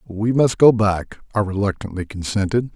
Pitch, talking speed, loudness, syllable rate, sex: 105 Hz, 150 wpm, -19 LUFS, 4.9 syllables/s, male